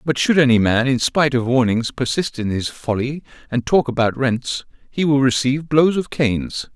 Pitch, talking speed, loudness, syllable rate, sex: 130 Hz, 195 wpm, -18 LUFS, 5.1 syllables/s, male